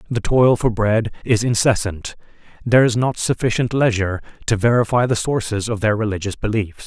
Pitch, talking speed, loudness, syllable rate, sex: 110 Hz, 165 wpm, -18 LUFS, 5.5 syllables/s, male